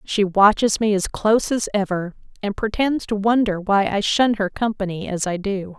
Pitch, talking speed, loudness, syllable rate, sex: 205 Hz, 195 wpm, -20 LUFS, 4.8 syllables/s, female